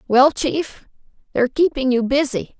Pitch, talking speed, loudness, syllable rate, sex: 260 Hz, 140 wpm, -19 LUFS, 4.6 syllables/s, female